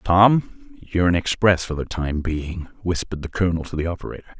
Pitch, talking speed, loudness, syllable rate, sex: 85 Hz, 190 wpm, -22 LUFS, 5.8 syllables/s, male